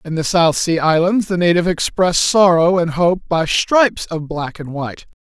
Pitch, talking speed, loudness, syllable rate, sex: 170 Hz, 195 wpm, -16 LUFS, 4.9 syllables/s, male